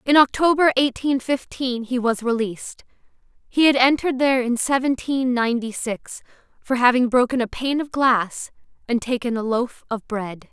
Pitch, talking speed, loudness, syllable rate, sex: 250 Hz, 160 wpm, -20 LUFS, 4.9 syllables/s, female